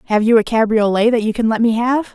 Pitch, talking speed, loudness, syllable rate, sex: 225 Hz, 280 wpm, -15 LUFS, 6.0 syllables/s, female